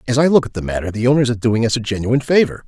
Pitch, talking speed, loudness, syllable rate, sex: 120 Hz, 315 wpm, -17 LUFS, 7.9 syllables/s, male